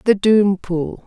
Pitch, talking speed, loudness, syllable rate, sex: 195 Hz, 170 wpm, -17 LUFS, 3.4 syllables/s, female